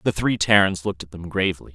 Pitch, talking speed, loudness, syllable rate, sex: 95 Hz, 240 wpm, -21 LUFS, 6.8 syllables/s, male